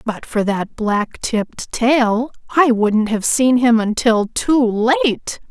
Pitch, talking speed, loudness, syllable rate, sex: 230 Hz, 155 wpm, -17 LUFS, 3.2 syllables/s, female